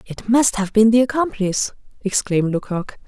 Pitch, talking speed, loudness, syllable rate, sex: 215 Hz, 155 wpm, -18 LUFS, 5.3 syllables/s, female